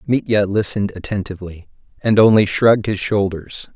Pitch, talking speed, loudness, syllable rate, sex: 100 Hz, 130 wpm, -17 LUFS, 5.5 syllables/s, male